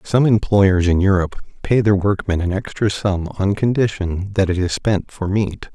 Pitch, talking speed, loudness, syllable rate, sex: 100 Hz, 190 wpm, -18 LUFS, 4.7 syllables/s, male